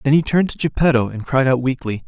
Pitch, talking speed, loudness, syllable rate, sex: 135 Hz, 260 wpm, -18 LUFS, 6.7 syllables/s, male